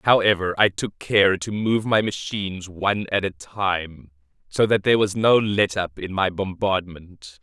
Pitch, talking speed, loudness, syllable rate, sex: 95 Hz, 180 wpm, -21 LUFS, 4.4 syllables/s, male